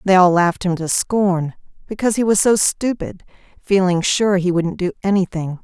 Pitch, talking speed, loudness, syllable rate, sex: 190 Hz, 180 wpm, -17 LUFS, 5.0 syllables/s, female